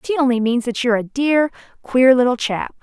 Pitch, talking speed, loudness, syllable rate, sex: 250 Hz, 215 wpm, -17 LUFS, 5.5 syllables/s, female